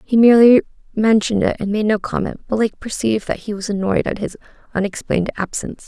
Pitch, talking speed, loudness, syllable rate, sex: 210 Hz, 195 wpm, -18 LUFS, 6.5 syllables/s, female